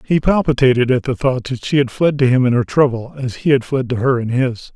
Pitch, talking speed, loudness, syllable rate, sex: 130 Hz, 275 wpm, -16 LUFS, 5.8 syllables/s, male